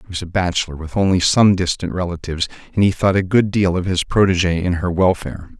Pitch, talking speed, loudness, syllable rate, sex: 90 Hz, 225 wpm, -18 LUFS, 6.1 syllables/s, male